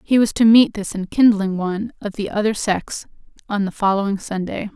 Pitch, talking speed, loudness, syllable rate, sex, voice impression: 205 Hz, 190 wpm, -19 LUFS, 5.3 syllables/s, female, very feminine, slightly young, slightly adult-like, very thin, tensed, powerful, bright, hard, clear, fluent, very cute, intellectual, very refreshing, sincere, calm, very friendly, very reassuring, very unique, very elegant, very sweet, very kind, very modest, light